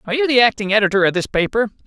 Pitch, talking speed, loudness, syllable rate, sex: 215 Hz, 255 wpm, -16 LUFS, 8.1 syllables/s, male